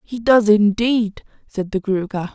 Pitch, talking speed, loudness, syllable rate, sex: 210 Hz, 155 wpm, -18 LUFS, 4.0 syllables/s, female